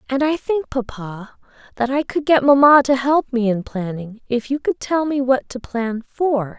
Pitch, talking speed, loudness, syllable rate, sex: 255 Hz, 210 wpm, -18 LUFS, 4.4 syllables/s, female